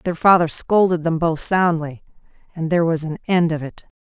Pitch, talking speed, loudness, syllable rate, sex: 165 Hz, 195 wpm, -18 LUFS, 5.2 syllables/s, female